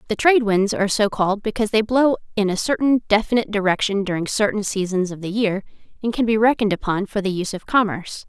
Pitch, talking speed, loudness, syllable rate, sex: 210 Hz, 215 wpm, -20 LUFS, 6.7 syllables/s, female